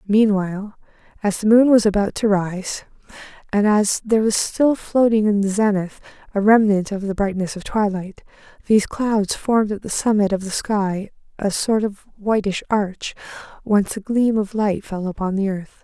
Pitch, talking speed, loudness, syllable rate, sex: 205 Hz, 180 wpm, -19 LUFS, 4.8 syllables/s, female